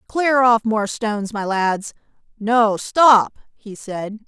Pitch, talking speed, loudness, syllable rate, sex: 220 Hz, 140 wpm, -18 LUFS, 3.2 syllables/s, female